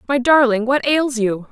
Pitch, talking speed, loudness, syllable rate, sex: 255 Hz, 200 wpm, -16 LUFS, 4.5 syllables/s, female